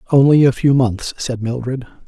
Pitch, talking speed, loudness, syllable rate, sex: 130 Hz, 175 wpm, -16 LUFS, 4.7 syllables/s, male